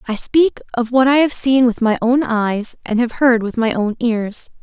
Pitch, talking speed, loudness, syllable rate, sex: 240 Hz, 235 wpm, -16 LUFS, 4.4 syllables/s, female